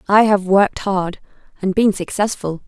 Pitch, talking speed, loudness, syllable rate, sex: 195 Hz, 155 wpm, -17 LUFS, 4.8 syllables/s, female